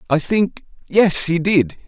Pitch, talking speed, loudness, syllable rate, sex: 175 Hz, 130 wpm, -17 LUFS, 3.6 syllables/s, male